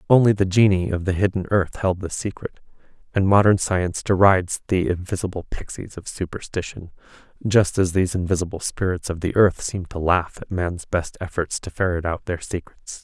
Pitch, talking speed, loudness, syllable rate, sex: 90 Hz, 180 wpm, -22 LUFS, 5.4 syllables/s, male